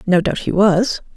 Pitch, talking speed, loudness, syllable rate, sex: 195 Hz, 205 wpm, -16 LUFS, 4.3 syllables/s, female